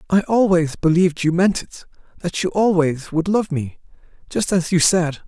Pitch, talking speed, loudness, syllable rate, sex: 170 Hz, 180 wpm, -19 LUFS, 4.8 syllables/s, male